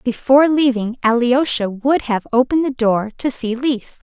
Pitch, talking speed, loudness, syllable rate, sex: 250 Hz, 160 wpm, -17 LUFS, 4.7 syllables/s, female